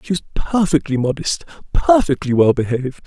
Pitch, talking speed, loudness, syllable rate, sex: 150 Hz, 135 wpm, -18 LUFS, 5.5 syllables/s, male